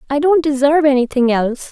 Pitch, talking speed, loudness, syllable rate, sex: 275 Hz, 175 wpm, -14 LUFS, 6.6 syllables/s, female